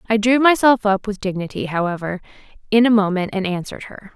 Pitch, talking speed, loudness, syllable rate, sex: 210 Hz, 190 wpm, -18 LUFS, 6.1 syllables/s, female